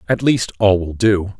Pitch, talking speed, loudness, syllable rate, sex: 100 Hz, 215 wpm, -16 LUFS, 4.4 syllables/s, male